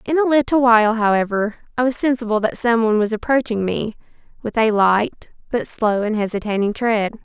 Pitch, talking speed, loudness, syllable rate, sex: 225 Hz, 180 wpm, -18 LUFS, 5.4 syllables/s, female